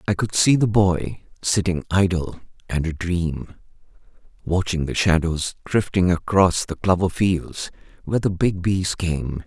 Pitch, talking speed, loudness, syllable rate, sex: 90 Hz, 145 wpm, -21 LUFS, 4.2 syllables/s, male